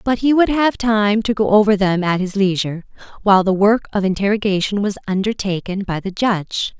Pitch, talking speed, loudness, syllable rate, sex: 205 Hz, 195 wpm, -17 LUFS, 5.6 syllables/s, female